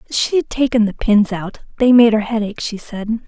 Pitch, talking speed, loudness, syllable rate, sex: 225 Hz, 220 wpm, -16 LUFS, 4.9 syllables/s, female